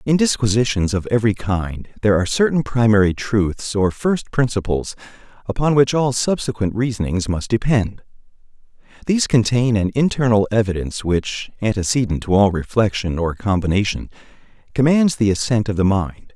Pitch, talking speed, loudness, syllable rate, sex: 110 Hz, 140 wpm, -18 LUFS, 5.3 syllables/s, male